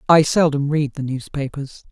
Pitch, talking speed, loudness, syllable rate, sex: 145 Hz, 155 wpm, -19 LUFS, 4.7 syllables/s, female